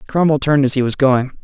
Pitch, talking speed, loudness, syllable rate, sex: 140 Hz, 250 wpm, -15 LUFS, 6.8 syllables/s, male